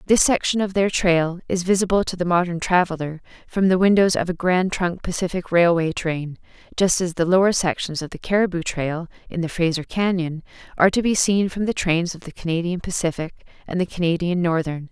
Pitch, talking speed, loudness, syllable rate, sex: 175 Hz, 195 wpm, -21 LUFS, 5.6 syllables/s, female